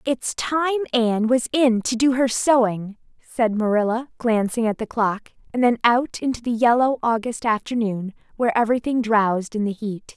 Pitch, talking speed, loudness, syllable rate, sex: 235 Hz, 170 wpm, -21 LUFS, 5.0 syllables/s, female